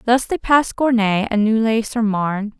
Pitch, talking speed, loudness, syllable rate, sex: 225 Hz, 185 wpm, -18 LUFS, 5.0 syllables/s, female